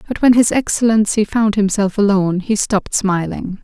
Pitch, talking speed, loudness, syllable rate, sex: 205 Hz, 165 wpm, -15 LUFS, 5.2 syllables/s, female